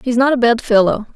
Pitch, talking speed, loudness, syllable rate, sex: 235 Hz, 260 wpm, -14 LUFS, 6.1 syllables/s, female